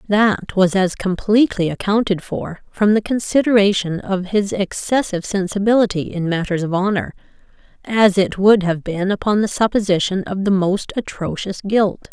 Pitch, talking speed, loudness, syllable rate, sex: 195 Hz, 150 wpm, -18 LUFS, 4.9 syllables/s, female